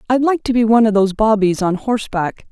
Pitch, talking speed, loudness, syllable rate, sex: 220 Hz, 240 wpm, -16 LUFS, 6.5 syllables/s, female